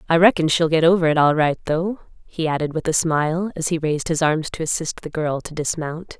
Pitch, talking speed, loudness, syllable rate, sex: 160 Hz, 230 wpm, -20 LUFS, 5.6 syllables/s, female